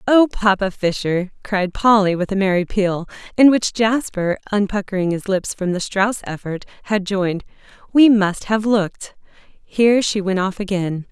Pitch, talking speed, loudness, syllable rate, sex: 200 Hz, 155 wpm, -18 LUFS, 4.8 syllables/s, female